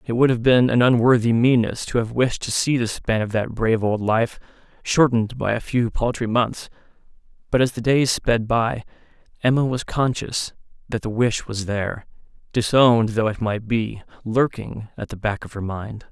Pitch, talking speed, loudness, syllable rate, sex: 115 Hz, 190 wpm, -21 LUFS, 4.9 syllables/s, male